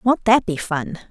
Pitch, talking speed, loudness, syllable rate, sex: 195 Hz, 215 wpm, -19 LUFS, 4.1 syllables/s, female